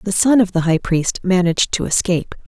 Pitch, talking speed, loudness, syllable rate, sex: 185 Hz, 210 wpm, -17 LUFS, 5.9 syllables/s, female